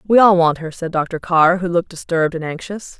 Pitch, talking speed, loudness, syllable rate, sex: 170 Hz, 240 wpm, -17 LUFS, 5.5 syllables/s, female